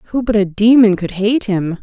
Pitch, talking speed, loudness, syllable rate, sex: 210 Hz, 230 wpm, -14 LUFS, 5.1 syllables/s, female